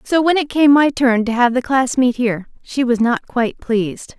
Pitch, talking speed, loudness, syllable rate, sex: 250 Hz, 245 wpm, -16 LUFS, 5.0 syllables/s, female